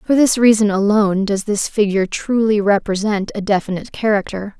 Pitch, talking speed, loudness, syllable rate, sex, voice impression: 205 Hz, 155 wpm, -16 LUFS, 5.6 syllables/s, female, very feminine, slightly adult-like, fluent, slightly cute, slightly sincere, friendly